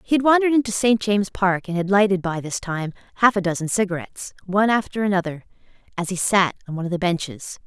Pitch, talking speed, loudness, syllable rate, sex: 195 Hz, 220 wpm, -21 LUFS, 6.6 syllables/s, female